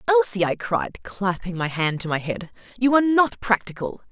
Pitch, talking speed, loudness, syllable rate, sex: 205 Hz, 190 wpm, -22 LUFS, 5.0 syllables/s, female